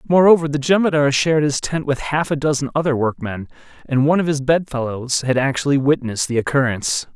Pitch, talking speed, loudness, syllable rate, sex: 140 Hz, 185 wpm, -18 LUFS, 6.1 syllables/s, male